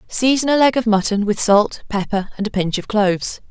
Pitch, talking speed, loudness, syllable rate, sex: 215 Hz, 225 wpm, -17 LUFS, 5.4 syllables/s, female